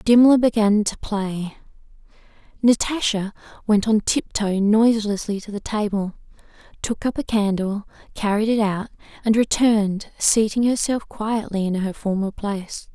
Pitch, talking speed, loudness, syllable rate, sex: 210 Hz, 130 wpm, -21 LUFS, 4.5 syllables/s, female